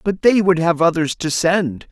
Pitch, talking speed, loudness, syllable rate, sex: 170 Hz, 220 wpm, -17 LUFS, 4.4 syllables/s, male